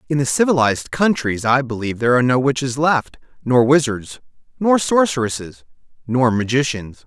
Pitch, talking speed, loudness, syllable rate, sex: 135 Hz, 145 wpm, -18 LUFS, 5.5 syllables/s, male